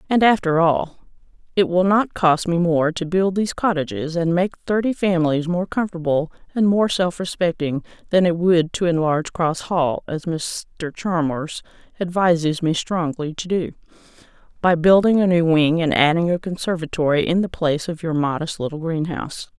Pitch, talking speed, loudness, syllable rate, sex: 170 Hz, 165 wpm, -20 LUFS, 5.0 syllables/s, female